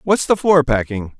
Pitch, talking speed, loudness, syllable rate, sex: 145 Hz, 200 wpm, -16 LUFS, 4.6 syllables/s, male